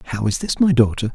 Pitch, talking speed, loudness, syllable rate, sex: 125 Hz, 260 wpm, -18 LUFS, 6.9 syllables/s, male